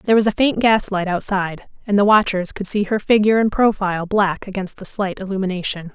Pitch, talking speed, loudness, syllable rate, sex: 200 Hz, 200 wpm, -18 LUFS, 5.9 syllables/s, female